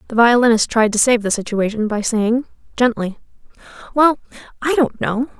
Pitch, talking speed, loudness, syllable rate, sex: 230 Hz, 155 wpm, -17 LUFS, 5.2 syllables/s, female